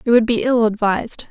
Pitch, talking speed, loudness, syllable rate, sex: 225 Hz, 230 wpm, -17 LUFS, 5.8 syllables/s, female